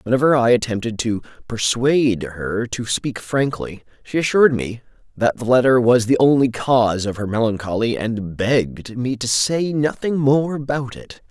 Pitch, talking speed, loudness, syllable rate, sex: 120 Hz, 165 wpm, -19 LUFS, 4.7 syllables/s, male